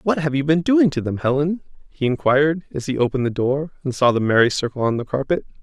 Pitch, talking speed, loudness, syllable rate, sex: 140 Hz, 245 wpm, -20 LUFS, 6.3 syllables/s, male